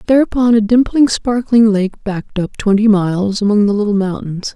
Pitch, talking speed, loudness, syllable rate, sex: 210 Hz, 170 wpm, -14 LUFS, 5.4 syllables/s, female